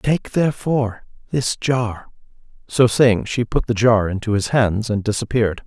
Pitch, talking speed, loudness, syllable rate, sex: 115 Hz, 160 wpm, -19 LUFS, 4.6 syllables/s, male